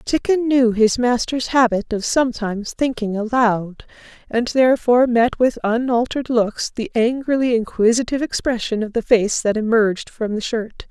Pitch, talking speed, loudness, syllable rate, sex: 235 Hz, 150 wpm, -18 LUFS, 5.0 syllables/s, female